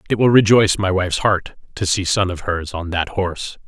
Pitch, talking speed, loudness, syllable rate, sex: 95 Hz, 230 wpm, -18 LUFS, 5.6 syllables/s, male